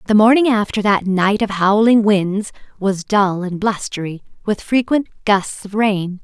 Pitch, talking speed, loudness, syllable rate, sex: 205 Hz, 165 wpm, -16 LUFS, 4.1 syllables/s, female